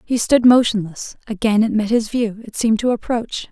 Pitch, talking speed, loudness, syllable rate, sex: 220 Hz, 205 wpm, -17 LUFS, 5.2 syllables/s, female